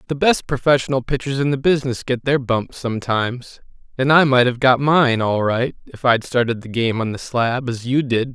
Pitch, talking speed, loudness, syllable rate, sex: 125 Hz, 215 wpm, -18 LUFS, 5.2 syllables/s, male